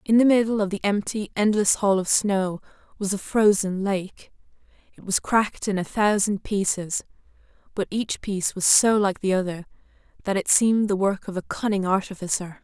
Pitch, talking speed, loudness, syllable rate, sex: 200 Hz, 180 wpm, -23 LUFS, 5.1 syllables/s, female